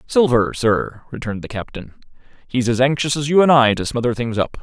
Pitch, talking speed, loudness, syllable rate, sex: 125 Hz, 210 wpm, -18 LUFS, 5.6 syllables/s, male